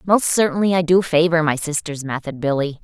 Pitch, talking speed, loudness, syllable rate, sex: 165 Hz, 190 wpm, -18 LUFS, 5.6 syllables/s, female